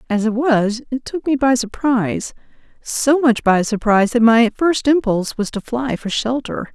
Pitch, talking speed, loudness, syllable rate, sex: 240 Hz, 185 wpm, -17 LUFS, 4.7 syllables/s, female